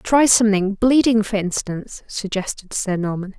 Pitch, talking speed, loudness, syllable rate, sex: 210 Hz, 125 wpm, -19 LUFS, 4.8 syllables/s, female